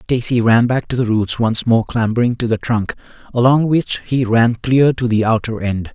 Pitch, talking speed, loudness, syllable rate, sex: 115 Hz, 210 wpm, -16 LUFS, 4.8 syllables/s, male